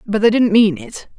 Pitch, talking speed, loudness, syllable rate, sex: 225 Hz, 255 wpm, -14 LUFS, 5.1 syllables/s, female